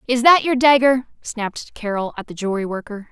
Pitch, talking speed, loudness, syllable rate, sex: 235 Hz, 195 wpm, -18 LUFS, 5.9 syllables/s, female